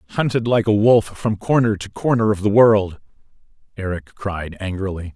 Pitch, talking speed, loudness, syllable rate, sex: 105 Hz, 165 wpm, -19 LUFS, 5.0 syllables/s, male